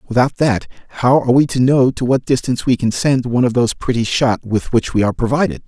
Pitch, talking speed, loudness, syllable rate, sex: 125 Hz, 245 wpm, -16 LUFS, 6.4 syllables/s, male